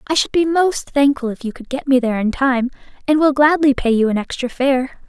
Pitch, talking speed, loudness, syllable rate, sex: 265 Hz, 250 wpm, -17 LUFS, 5.5 syllables/s, female